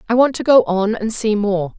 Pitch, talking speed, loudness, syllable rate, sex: 215 Hz, 270 wpm, -16 LUFS, 5.0 syllables/s, female